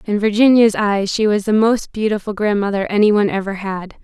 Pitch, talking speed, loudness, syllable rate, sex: 205 Hz, 195 wpm, -16 LUFS, 5.7 syllables/s, female